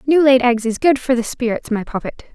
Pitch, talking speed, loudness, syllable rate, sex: 250 Hz, 255 wpm, -17 LUFS, 5.4 syllables/s, female